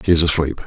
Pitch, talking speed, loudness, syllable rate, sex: 80 Hz, 270 wpm, -17 LUFS, 7.3 syllables/s, male